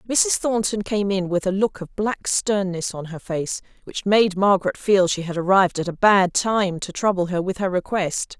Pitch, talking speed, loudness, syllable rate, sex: 190 Hz, 215 wpm, -21 LUFS, 4.8 syllables/s, female